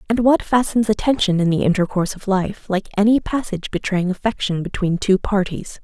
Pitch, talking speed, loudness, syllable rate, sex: 200 Hz, 175 wpm, -19 LUFS, 5.6 syllables/s, female